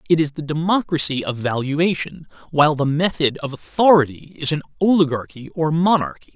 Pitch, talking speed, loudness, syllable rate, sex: 155 Hz, 150 wpm, -19 LUFS, 5.5 syllables/s, male